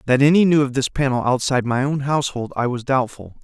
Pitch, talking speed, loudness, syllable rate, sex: 135 Hz, 225 wpm, -19 LUFS, 6.3 syllables/s, male